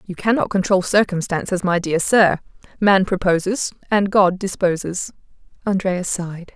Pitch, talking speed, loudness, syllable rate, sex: 190 Hz, 130 wpm, -19 LUFS, 4.7 syllables/s, female